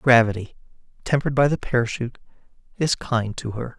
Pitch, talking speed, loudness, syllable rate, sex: 120 Hz, 145 wpm, -23 LUFS, 6.0 syllables/s, male